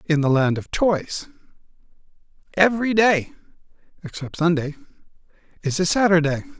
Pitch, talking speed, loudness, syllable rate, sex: 175 Hz, 110 wpm, -20 LUFS, 5.1 syllables/s, male